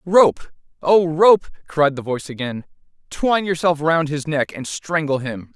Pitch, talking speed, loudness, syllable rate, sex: 155 Hz, 160 wpm, -19 LUFS, 4.4 syllables/s, male